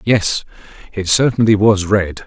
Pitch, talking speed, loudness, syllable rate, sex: 100 Hz, 130 wpm, -15 LUFS, 4.1 syllables/s, male